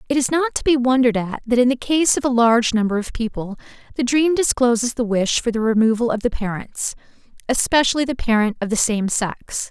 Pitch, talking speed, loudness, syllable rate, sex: 240 Hz, 215 wpm, -19 LUFS, 5.7 syllables/s, female